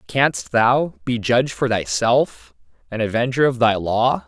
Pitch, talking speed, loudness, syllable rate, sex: 115 Hz, 155 wpm, -19 LUFS, 4.1 syllables/s, male